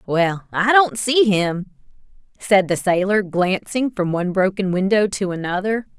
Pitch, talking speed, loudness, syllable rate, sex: 195 Hz, 150 wpm, -19 LUFS, 4.4 syllables/s, female